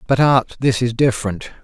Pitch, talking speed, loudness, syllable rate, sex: 125 Hz, 185 wpm, -17 LUFS, 5.2 syllables/s, male